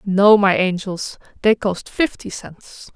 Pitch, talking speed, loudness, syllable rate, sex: 200 Hz, 140 wpm, -17 LUFS, 3.5 syllables/s, female